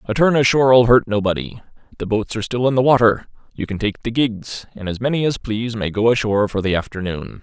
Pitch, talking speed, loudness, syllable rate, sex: 115 Hz, 220 wpm, -18 LUFS, 6.1 syllables/s, male